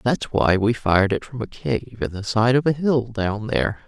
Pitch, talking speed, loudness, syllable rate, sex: 115 Hz, 250 wpm, -21 LUFS, 4.9 syllables/s, female